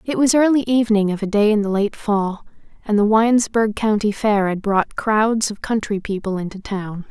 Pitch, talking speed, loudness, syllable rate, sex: 210 Hz, 205 wpm, -19 LUFS, 5.0 syllables/s, female